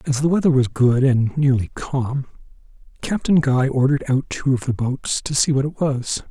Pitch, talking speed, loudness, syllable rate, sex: 135 Hz, 200 wpm, -19 LUFS, 4.9 syllables/s, male